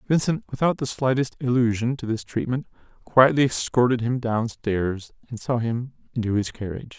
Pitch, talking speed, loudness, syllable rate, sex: 120 Hz, 155 wpm, -23 LUFS, 5.2 syllables/s, male